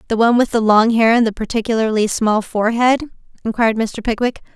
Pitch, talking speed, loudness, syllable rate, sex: 225 Hz, 185 wpm, -16 LUFS, 6.3 syllables/s, female